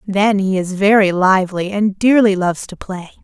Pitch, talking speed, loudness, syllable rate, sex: 195 Hz, 185 wpm, -14 LUFS, 5.0 syllables/s, female